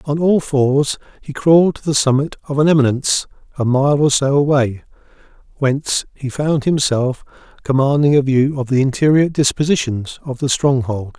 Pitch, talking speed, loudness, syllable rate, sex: 140 Hz, 160 wpm, -16 LUFS, 5.0 syllables/s, male